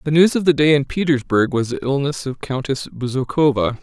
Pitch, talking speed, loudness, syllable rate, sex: 135 Hz, 205 wpm, -18 LUFS, 5.5 syllables/s, male